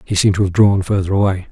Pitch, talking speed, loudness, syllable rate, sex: 95 Hz, 275 wpm, -15 LUFS, 7.2 syllables/s, male